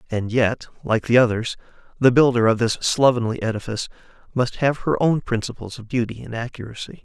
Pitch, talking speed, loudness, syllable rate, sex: 120 Hz, 170 wpm, -21 LUFS, 5.7 syllables/s, male